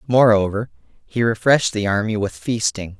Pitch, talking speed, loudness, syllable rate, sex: 110 Hz, 140 wpm, -19 LUFS, 5.2 syllables/s, male